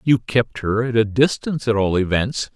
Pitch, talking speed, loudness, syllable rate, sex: 115 Hz, 210 wpm, -19 LUFS, 4.9 syllables/s, male